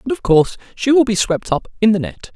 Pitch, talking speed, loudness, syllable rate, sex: 205 Hz, 280 wpm, -16 LUFS, 6.0 syllables/s, male